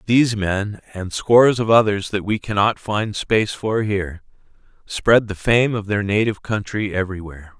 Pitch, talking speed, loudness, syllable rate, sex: 105 Hz, 165 wpm, -19 LUFS, 5.1 syllables/s, male